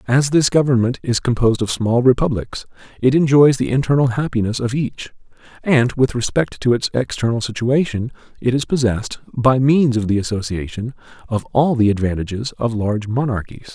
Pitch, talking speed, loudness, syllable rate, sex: 120 Hz, 160 wpm, -18 LUFS, 5.4 syllables/s, male